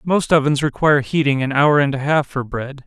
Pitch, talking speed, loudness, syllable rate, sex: 145 Hz, 230 wpm, -17 LUFS, 5.4 syllables/s, male